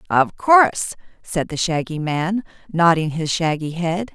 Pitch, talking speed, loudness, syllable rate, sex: 170 Hz, 145 wpm, -19 LUFS, 4.2 syllables/s, female